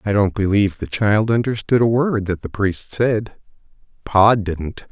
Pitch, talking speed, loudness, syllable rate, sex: 105 Hz, 170 wpm, -18 LUFS, 4.4 syllables/s, male